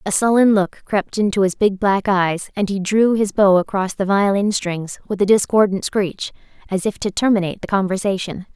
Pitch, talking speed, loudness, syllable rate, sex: 195 Hz, 195 wpm, -18 LUFS, 5.1 syllables/s, female